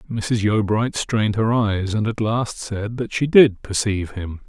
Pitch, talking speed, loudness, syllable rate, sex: 110 Hz, 190 wpm, -20 LUFS, 4.3 syllables/s, male